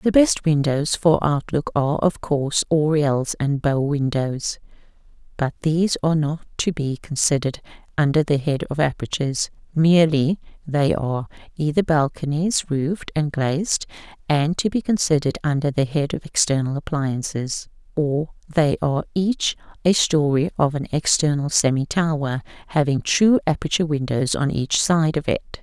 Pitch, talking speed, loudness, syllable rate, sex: 150 Hz, 145 wpm, -21 LUFS, 4.8 syllables/s, female